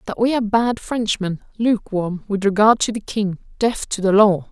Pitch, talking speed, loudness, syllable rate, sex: 210 Hz, 200 wpm, -19 LUFS, 5.0 syllables/s, female